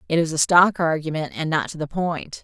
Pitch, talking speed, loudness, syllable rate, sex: 160 Hz, 245 wpm, -21 LUFS, 5.5 syllables/s, female